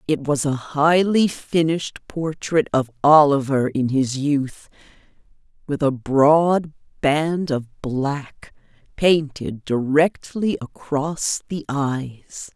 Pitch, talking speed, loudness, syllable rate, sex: 145 Hz, 105 wpm, -20 LUFS, 3.1 syllables/s, female